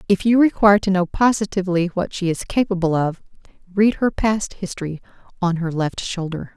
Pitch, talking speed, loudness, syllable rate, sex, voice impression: 190 Hz, 175 wpm, -20 LUFS, 5.5 syllables/s, female, feminine, middle-aged, tensed, slightly powerful, slightly hard, clear, intellectual, calm, reassuring, elegant, lively, slightly sharp